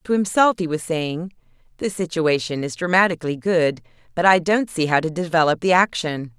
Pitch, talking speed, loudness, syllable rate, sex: 170 Hz, 180 wpm, -20 LUFS, 5.3 syllables/s, female